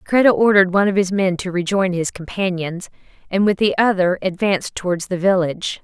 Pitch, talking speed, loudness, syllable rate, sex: 185 Hz, 185 wpm, -18 LUFS, 5.9 syllables/s, female